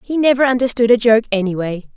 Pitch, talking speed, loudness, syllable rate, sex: 230 Hz, 185 wpm, -15 LUFS, 6.4 syllables/s, female